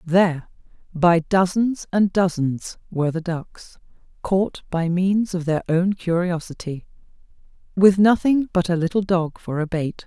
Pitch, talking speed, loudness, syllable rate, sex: 180 Hz, 135 wpm, -21 LUFS, 4.2 syllables/s, female